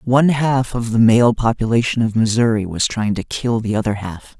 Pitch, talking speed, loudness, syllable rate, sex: 115 Hz, 205 wpm, -17 LUFS, 5.1 syllables/s, male